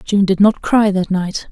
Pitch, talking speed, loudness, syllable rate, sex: 195 Hz, 240 wpm, -15 LUFS, 4.1 syllables/s, female